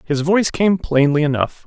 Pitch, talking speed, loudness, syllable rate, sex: 160 Hz, 180 wpm, -17 LUFS, 5.1 syllables/s, male